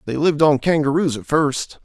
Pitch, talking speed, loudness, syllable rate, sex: 150 Hz, 195 wpm, -18 LUFS, 5.4 syllables/s, male